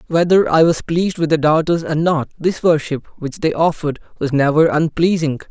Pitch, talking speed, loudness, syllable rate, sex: 160 Hz, 185 wpm, -16 LUFS, 5.3 syllables/s, male